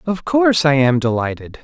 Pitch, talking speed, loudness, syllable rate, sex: 155 Hz, 185 wpm, -16 LUFS, 5.4 syllables/s, male